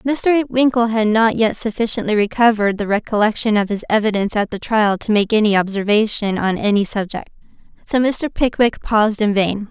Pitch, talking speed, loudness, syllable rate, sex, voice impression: 215 Hz, 175 wpm, -17 LUFS, 5.5 syllables/s, female, feminine, slightly young, slightly bright, fluent, refreshing, lively